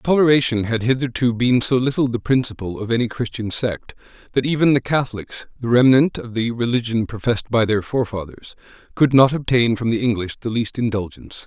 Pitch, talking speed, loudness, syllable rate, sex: 120 Hz, 180 wpm, -19 LUFS, 5.7 syllables/s, male